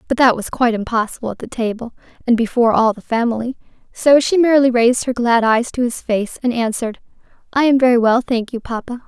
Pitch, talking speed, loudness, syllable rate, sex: 240 Hz, 210 wpm, -16 LUFS, 6.3 syllables/s, female